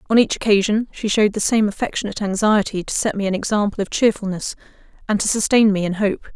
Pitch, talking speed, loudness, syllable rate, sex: 205 Hz, 210 wpm, -19 LUFS, 6.4 syllables/s, female